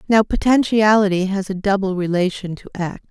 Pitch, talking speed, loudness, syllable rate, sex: 195 Hz, 155 wpm, -18 LUFS, 5.3 syllables/s, female